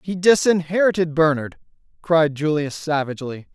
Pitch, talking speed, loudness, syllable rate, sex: 160 Hz, 100 wpm, -19 LUFS, 5.0 syllables/s, male